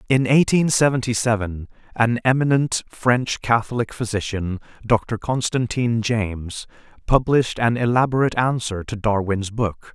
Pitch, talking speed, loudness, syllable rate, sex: 115 Hz, 115 wpm, -20 LUFS, 4.5 syllables/s, male